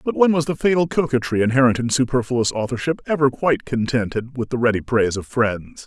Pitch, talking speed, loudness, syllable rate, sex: 125 Hz, 195 wpm, -20 LUFS, 6.1 syllables/s, male